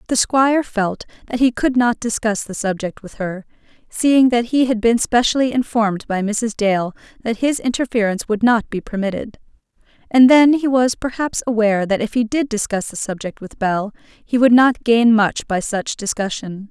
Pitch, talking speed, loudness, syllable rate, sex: 225 Hz, 190 wpm, -17 LUFS, 5.0 syllables/s, female